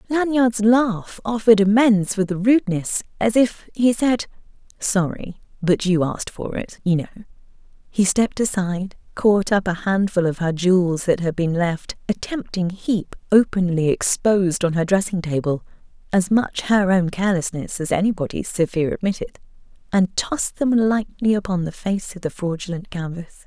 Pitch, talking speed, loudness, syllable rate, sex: 195 Hz, 155 wpm, -20 LUFS, 4.3 syllables/s, female